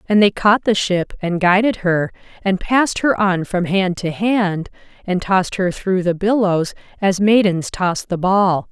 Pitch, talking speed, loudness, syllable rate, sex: 190 Hz, 185 wpm, -17 LUFS, 4.2 syllables/s, female